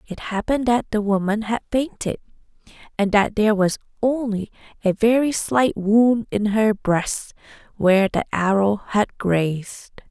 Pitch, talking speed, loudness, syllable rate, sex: 215 Hz, 140 wpm, -20 LUFS, 4.3 syllables/s, female